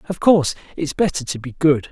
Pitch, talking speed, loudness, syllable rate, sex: 155 Hz, 220 wpm, -19 LUFS, 6.0 syllables/s, male